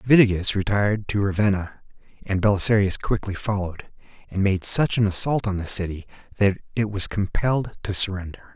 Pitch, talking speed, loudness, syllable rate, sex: 100 Hz, 155 wpm, -22 LUFS, 5.7 syllables/s, male